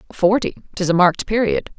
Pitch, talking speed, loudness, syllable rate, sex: 195 Hz, 170 wpm, -18 LUFS, 5.7 syllables/s, female